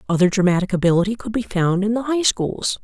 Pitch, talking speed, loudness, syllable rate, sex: 200 Hz, 210 wpm, -19 LUFS, 6.1 syllables/s, female